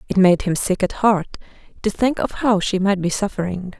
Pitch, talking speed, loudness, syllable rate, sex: 195 Hz, 220 wpm, -19 LUFS, 5.1 syllables/s, female